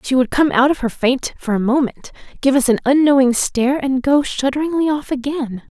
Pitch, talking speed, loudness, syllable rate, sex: 265 Hz, 205 wpm, -17 LUFS, 5.3 syllables/s, female